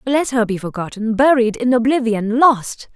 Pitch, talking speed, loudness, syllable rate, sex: 235 Hz, 120 wpm, -16 LUFS, 4.6 syllables/s, female